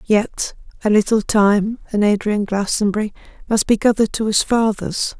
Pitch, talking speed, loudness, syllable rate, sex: 210 Hz, 150 wpm, -18 LUFS, 4.9 syllables/s, female